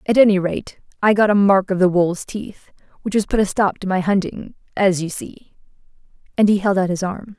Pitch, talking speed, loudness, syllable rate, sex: 195 Hz, 230 wpm, -18 LUFS, 5.5 syllables/s, female